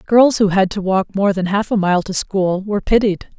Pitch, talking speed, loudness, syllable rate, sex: 195 Hz, 250 wpm, -16 LUFS, 4.9 syllables/s, female